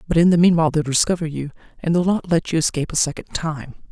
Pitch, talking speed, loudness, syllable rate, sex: 160 Hz, 245 wpm, -19 LUFS, 6.9 syllables/s, female